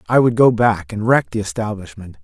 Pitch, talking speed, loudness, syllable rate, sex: 105 Hz, 215 wpm, -17 LUFS, 5.5 syllables/s, male